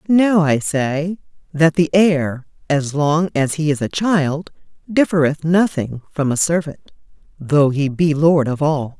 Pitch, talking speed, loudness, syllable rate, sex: 155 Hz, 160 wpm, -17 LUFS, 3.8 syllables/s, female